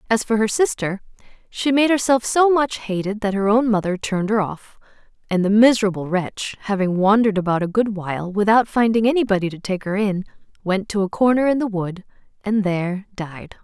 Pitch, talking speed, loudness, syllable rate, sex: 210 Hz, 195 wpm, -19 LUFS, 5.6 syllables/s, female